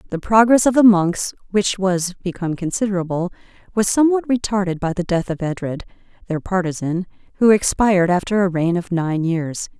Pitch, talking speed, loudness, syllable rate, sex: 190 Hz, 165 wpm, -18 LUFS, 5.5 syllables/s, female